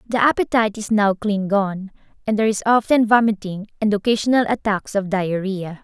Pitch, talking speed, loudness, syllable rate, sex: 210 Hz, 165 wpm, -19 LUFS, 5.4 syllables/s, female